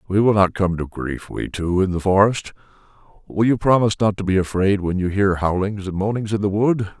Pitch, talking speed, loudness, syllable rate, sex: 100 Hz, 230 wpm, -20 LUFS, 5.6 syllables/s, male